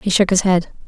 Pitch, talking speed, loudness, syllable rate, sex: 185 Hz, 275 wpm, -16 LUFS, 5.6 syllables/s, female